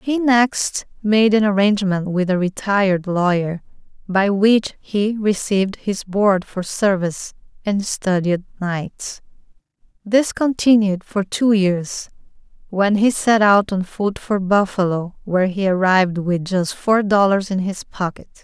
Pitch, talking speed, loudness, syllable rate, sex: 200 Hz, 140 wpm, -18 LUFS, 4.1 syllables/s, female